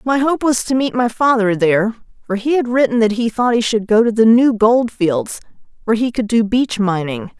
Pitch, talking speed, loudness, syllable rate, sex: 225 Hz, 235 wpm, -15 LUFS, 5.2 syllables/s, female